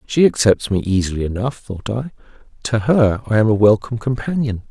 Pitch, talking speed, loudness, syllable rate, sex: 110 Hz, 180 wpm, -17 LUFS, 5.5 syllables/s, male